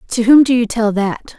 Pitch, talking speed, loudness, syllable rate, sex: 230 Hz, 260 wpm, -13 LUFS, 4.9 syllables/s, female